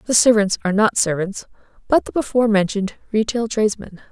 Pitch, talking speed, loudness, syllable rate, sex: 215 Hz, 160 wpm, -18 LUFS, 6.4 syllables/s, female